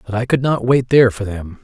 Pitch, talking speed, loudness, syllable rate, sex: 115 Hz, 295 wpm, -16 LUFS, 6.0 syllables/s, male